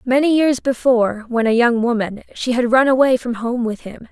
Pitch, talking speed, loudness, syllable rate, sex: 240 Hz, 220 wpm, -17 LUFS, 5.1 syllables/s, female